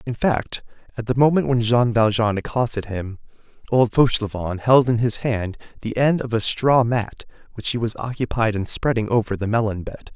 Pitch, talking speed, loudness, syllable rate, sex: 115 Hz, 190 wpm, -20 LUFS, 5.1 syllables/s, male